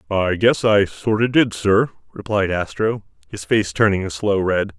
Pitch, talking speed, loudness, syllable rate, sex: 100 Hz, 175 wpm, -19 LUFS, 4.4 syllables/s, male